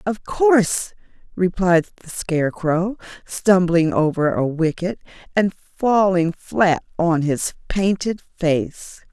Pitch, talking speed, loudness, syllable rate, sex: 180 Hz, 105 wpm, -19 LUFS, 3.6 syllables/s, female